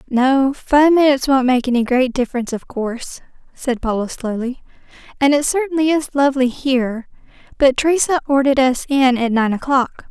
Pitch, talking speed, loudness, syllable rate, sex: 265 Hz, 160 wpm, -17 LUFS, 5.5 syllables/s, female